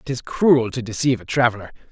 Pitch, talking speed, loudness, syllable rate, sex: 120 Hz, 220 wpm, -19 LUFS, 6.5 syllables/s, male